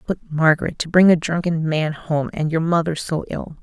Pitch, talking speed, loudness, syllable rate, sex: 165 Hz, 200 wpm, -19 LUFS, 5.1 syllables/s, female